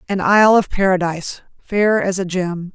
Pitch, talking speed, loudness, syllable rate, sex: 190 Hz, 175 wpm, -16 LUFS, 5.0 syllables/s, female